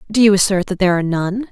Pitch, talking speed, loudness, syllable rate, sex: 195 Hz, 275 wpm, -15 LUFS, 7.8 syllables/s, female